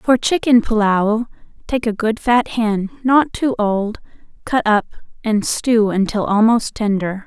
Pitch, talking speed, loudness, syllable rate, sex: 225 Hz, 150 wpm, -17 LUFS, 3.9 syllables/s, female